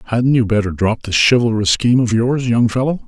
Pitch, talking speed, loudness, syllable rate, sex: 115 Hz, 215 wpm, -15 LUFS, 5.7 syllables/s, male